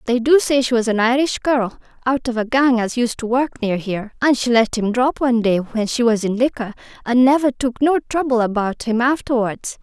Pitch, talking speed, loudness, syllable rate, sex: 240 Hz, 225 wpm, -18 LUFS, 5.3 syllables/s, female